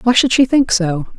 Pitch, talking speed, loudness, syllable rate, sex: 225 Hz, 255 wpm, -14 LUFS, 4.9 syllables/s, female